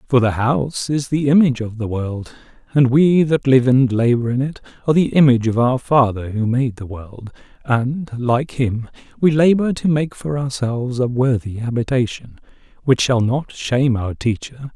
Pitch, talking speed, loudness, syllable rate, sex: 130 Hz, 185 wpm, -18 LUFS, 4.9 syllables/s, male